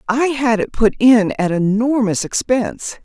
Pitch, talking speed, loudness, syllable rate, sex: 235 Hz, 160 wpm, -16 LUFS, 4.4 syllables/s, female